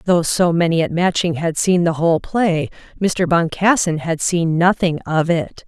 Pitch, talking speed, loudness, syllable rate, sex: 170 Hz, 180 wpm, -17 LUFS, 4.5 syllables/s, female